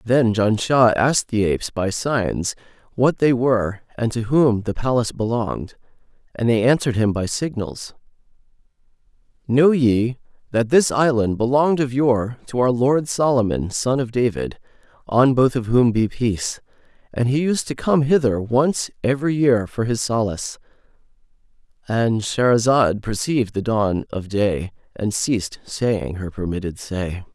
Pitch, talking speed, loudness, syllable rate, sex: 115 Hz, 145 wpm, -20 LUFS, 4.4 syllables/s, male